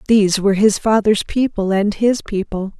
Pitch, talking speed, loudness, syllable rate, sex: 205 Hz, 170 wpm, -16 LUFS, 5.2 syllables/s, female